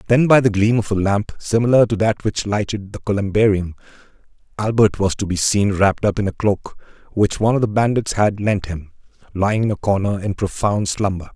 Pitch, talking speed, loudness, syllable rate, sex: 105 Hz, 205 wpm, -18 LUFS, 5.6 syllables/s, male